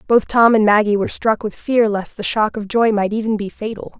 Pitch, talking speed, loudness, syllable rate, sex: 215 Hz, 255 wpm, -17 LUFS, 5.5 syllables/s, female